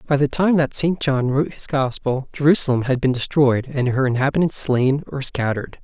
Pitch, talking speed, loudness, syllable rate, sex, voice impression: 135 Hz, 195 wpm, -19 LUFS, 5.4 syllables/s, male, masculine, adult-like, slightly soft, slightly fluent, slightly calm, unique, slightly sweet, kind